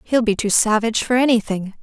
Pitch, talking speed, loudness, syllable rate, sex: 220 Hz, 200 wpm, -18 LUFS, 6.0 syllables/s, female